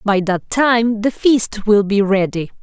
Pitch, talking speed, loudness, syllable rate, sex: 210 Hz, 185 wpm, -16 LUFS, 3.9 syllables/s, female